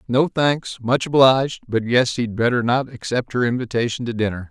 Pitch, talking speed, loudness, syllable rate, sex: 120 Hz, 185 wpm, -20 LUFS, 5.4 syllables/s, male